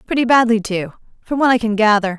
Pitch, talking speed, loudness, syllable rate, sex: 225 Hz, 220 wpm, -16 LUFS, 6.2 syllables/s, female